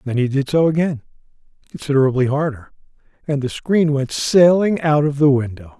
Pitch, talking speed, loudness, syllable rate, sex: 145 Hz, 165 wpm, -17 LUFS, 5.4 syllables/s, male